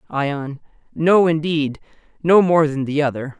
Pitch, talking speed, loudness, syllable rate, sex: 150 Hz, 140 wpm, -18 LUFS, 4.1 syllables/s, male